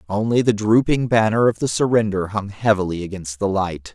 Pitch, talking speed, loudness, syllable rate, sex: 105 Hz, 180 wpm, -19 LUFS, 5.3 syllables/s, male